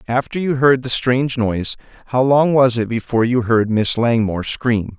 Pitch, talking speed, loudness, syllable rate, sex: 120 Hz, 190 wpm, -17 LUFS, 5.2 syllables/s, male